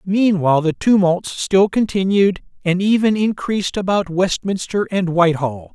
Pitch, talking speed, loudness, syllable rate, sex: 190 Hz, 125 wpm, -17 LUFS, 4.6 syllables/s, male